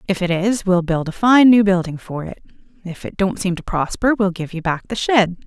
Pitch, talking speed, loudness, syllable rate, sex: 190 Hz, 250 wpm, -18 LUFS, 5.2 syllables/s, female